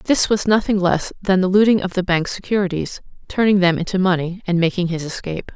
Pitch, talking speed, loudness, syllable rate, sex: 185 Hz, 205 wpm, -18 LUFS, 5.8 syllables/s, female